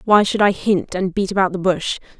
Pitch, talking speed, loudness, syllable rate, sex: 190 Hz, 245 wpm, -18 LUFS, 5.3 syllables/s, female